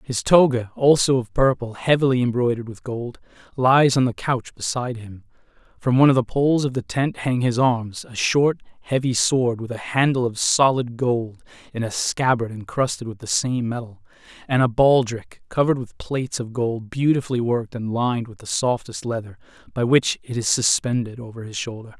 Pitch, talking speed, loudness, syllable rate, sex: 120 Hz, 185 wpm, -21 LUFS, 5.2 syllables/s, male